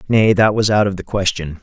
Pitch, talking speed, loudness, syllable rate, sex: 100 Hz, 260 wpm, -16 LUFS, 5.5 syllables/s, male